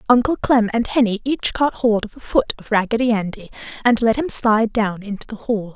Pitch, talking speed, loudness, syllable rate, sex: 225 Hz, 220 wpm, -19 LUFS, 5.5 syllables/s, female